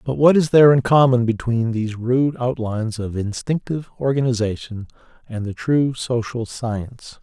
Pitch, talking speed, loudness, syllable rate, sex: 120 Hz, 150 wpm, -19 LUFS, 5.0 syllables/s, male